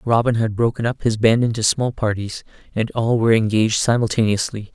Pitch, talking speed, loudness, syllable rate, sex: 115 Hz, 175 wpm, -19 LUFS, 5.8 syllables/s, male